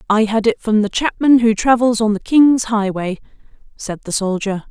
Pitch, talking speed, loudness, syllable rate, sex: 220 Hz, 190 wpm, -15 LUFS, 4.8 syllables/s, female